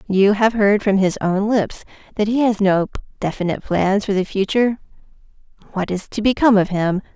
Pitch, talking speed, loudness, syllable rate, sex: 205 Hz, 185 wpm, -18 LUFS, 5.5 syllables/s, female